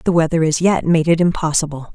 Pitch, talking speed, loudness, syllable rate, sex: 165 Hz, 215 wpm, -16 LUFS, 6.0 syllables/s, female